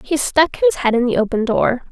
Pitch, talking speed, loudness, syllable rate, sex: 265 Hz, 250 wpm, -16 LUFS, 6.1 syllables/s, female